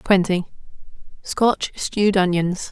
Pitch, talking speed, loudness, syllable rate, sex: 190 Hz, 65 wpm, -20 LUFS, 3.6 syllables/s, female